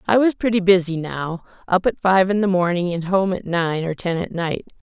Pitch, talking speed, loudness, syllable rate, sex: 185 Hz, 230 wpm, -20 LUFS, 5.1 syllables/s, female